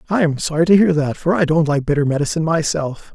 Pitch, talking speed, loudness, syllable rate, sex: 160 Hz, 250 wpm, -17 LUFS, 6.4 syllables/s, male